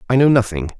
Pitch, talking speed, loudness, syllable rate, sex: 115 Hz, 225 wpm, -16 LUFS, 7.1 syllables/s, male